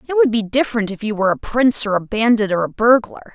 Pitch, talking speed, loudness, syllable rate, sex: 225 Hz, 270 wpm, -17 LUFS, 6.6 syllables/s, female